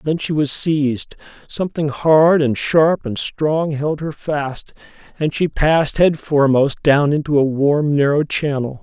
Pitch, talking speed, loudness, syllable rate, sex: 145 Hz, 165 wpm, -17 LUFS, 4.2 syllables/s, male